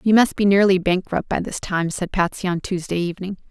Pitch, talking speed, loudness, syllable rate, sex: 185 Hz, 225 wpm, -20 LUFS, 5.7 syllables/s, female